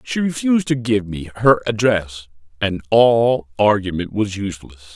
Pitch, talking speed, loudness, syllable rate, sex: 105 Hz, 145 wpm, -18 LUFS, 4.7 syllables/s, male